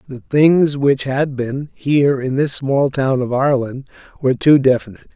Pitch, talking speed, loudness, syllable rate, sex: 135 Hz, 175 wpm, -16 LUFS, 4.9 syllables/s, male